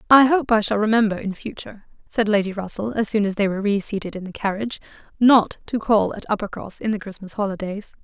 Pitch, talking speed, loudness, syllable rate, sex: 210 Hz, 210 wpm, -21 LUFS, 6.2 syllables/s, female